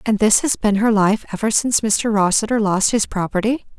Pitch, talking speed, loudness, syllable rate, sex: 215 Hz, 205 wpm, -17 LUFS, 5.4 syllables/s, female